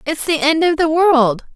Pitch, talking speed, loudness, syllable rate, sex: 305 Hz, 230 wpm, -15 LUFS, 4.5 syllables/s, female